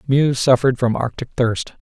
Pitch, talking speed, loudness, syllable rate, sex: 125 Hz, 160 wpm, -18 LUFS, 5.1 syllables/s, male